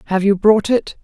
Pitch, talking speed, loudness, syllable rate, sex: 205 Hz, 230 wpm, -15 LUFS, 5.1 syllables/s, female